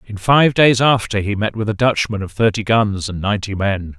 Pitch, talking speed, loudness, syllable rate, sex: 105 Hz, 225 wpm, -16 LUFS, 5.2 syllables/s, male